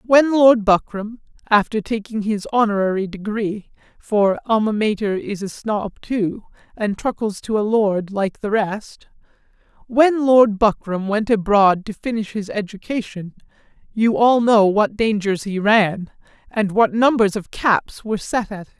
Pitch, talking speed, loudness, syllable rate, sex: 210 Hz, 150 wpm, -19 LUFS, 3.7 syllables/s, male